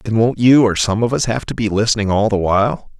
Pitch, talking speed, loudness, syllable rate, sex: 110 Hz, 280 wpm, -15 LUFS, 6.0 syllables/s, male